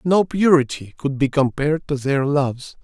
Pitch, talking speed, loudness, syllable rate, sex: 145 Hz, 170 wpm, -19 LUFS, 4.9 syllables/s, male